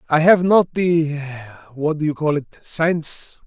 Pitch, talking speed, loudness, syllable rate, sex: 155 Hz, 140 wpm, -18 LUFS, 3.6 syllables/s, male